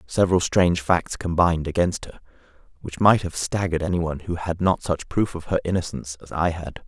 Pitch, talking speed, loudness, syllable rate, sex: 85 Hz, 190 wpm, -23 LUFS, 5.8 syllables/s, male